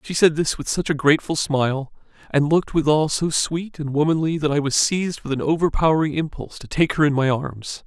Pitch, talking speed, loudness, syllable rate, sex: 150 Hz, 220 wpm, -20 LUFS, 5.8 syllables/s, male